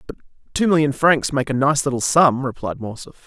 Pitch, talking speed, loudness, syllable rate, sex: 140 Hz, 200 wpm, -18 LUFS, 5.5 syllables/s, male